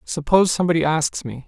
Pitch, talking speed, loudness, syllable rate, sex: 160 Hz, 160 wpm, -19 LUFS, 6.6 syllables/s, male